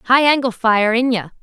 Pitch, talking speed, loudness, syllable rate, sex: 235 Hz, 170 wpm, -16 LUFS, 4.6 syllables/s, female